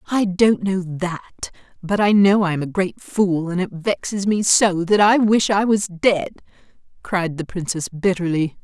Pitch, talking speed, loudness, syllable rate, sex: 190 Hz, 190 wpm, -19 LUFS, 4.3 syllables/s, female